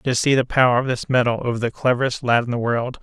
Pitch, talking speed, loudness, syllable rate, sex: 125 Hz, 275 wpm, -19 LUFS, 6.5 syllables/s, male